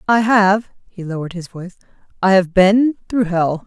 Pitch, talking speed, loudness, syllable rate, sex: 195 Hz, 145 wpm, -16 LUFS, 5.4 syllables/s, female